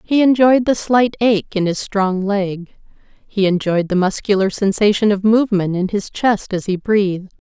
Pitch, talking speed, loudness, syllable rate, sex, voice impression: 205 Hz, 175 wpm, -16 LUFS, 4.6 syllables/s, female, feminine, adult-like, tensed, powerful, clear, fluent, intellectual, friendly, elegant, lively, slightly intense